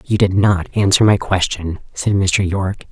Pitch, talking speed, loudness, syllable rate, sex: 95 Hz, 185 wpm, -16 LUFS, 4.5 syllables/s, female